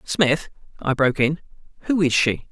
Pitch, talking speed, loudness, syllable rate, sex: 150 Hz, 165 wpm, -21 LUFS, 4.8 syllables/s, male